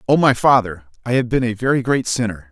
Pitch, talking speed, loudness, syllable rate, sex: 115 Hz, 240 wpm, -17 LUFS, 6.0 syllables/s, male